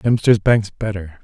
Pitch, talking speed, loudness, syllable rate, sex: 105 Hz, 145 wpm, -17 LUFS, 4.2 syllables/s, male